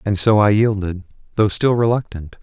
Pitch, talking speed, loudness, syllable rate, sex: 100 Hz, 175 wpm, -17 LUFS, 5.0 syllables/s, male